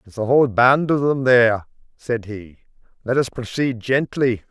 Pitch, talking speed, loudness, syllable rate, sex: 120 Hz, 175 wpm, -19 LUFS, 5.0 syllables/s, male